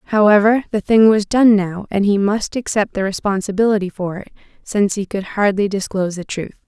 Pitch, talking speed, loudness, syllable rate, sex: 205 Hz, 190 wpm, -17 LUFS, 5.6 syllables/s, female